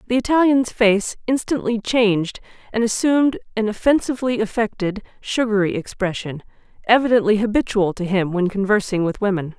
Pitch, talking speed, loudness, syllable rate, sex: 215 Hz, 125 wpm, -19 LUFS, 5.5 syllables/s, female